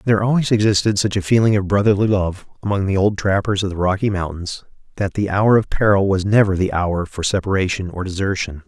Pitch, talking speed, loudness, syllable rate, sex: 100 Hz, 205 wpm, -18 LUFS, 6.0 syllables/s, male